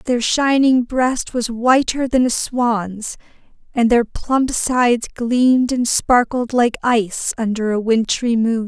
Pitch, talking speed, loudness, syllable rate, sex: 240 Hz, 145 wpm, -17 LUFS, 3.7 syllables/s, female